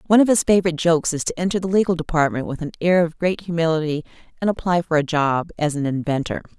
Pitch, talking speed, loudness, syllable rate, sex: 165 Hz, 230 wpm, -20 LUFS, 6.9 syllables/s, female